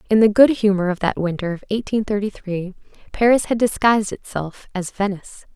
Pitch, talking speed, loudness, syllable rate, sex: 205 Hz, 185 wpm, -19 LUFS, 5.6 syllables/s, female